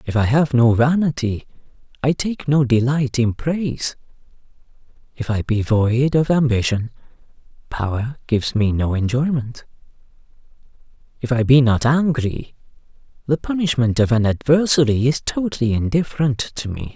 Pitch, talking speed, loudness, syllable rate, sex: 130 Hz, 130 wpm, -19 LUFS, 4.8 syllables/s, male